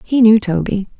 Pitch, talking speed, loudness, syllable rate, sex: 210 Hz, 180 wpm, -14 LUFS, 4.9 syllables/s, female